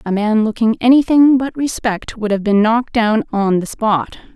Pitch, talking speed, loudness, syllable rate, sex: 225 Hz, 195 wpm, -15 LUFS, 4.8 syllables/s, female